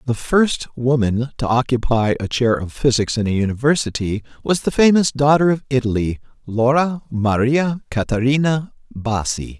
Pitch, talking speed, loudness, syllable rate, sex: 125 Hz, 140 wpm, -18 LUFS, 4.8 syllables/s, male